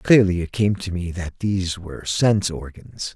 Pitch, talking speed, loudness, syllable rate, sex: 95 Hz, 190 wpm, -22 LUFS, 5.0 syllables/s, male